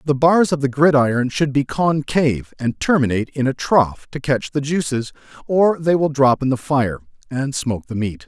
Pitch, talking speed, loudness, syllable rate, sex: 140 Hz, 205 wpm, -18 LUFS, 5.1 syllables/s, male